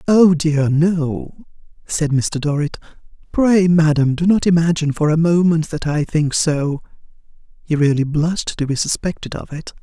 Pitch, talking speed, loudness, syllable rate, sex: 160 Hz, 160 wpm, -17 LUFS, 4.6 syllables/s, female